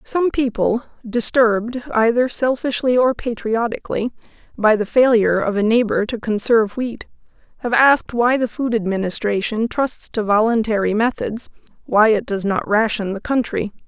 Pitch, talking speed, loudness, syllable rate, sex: 230 Hz, 145 wpm, -18 LUFS, 4.9 syllables/s, female